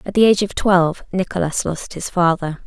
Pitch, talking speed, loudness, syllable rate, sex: 180 Hz, 200 wpm, -18 LUFS, 5.7 syllables/s, female